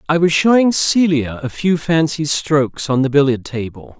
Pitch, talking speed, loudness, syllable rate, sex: 150 Hz, 180 wpm, -16 LUFS, 4.8 syllables/s, male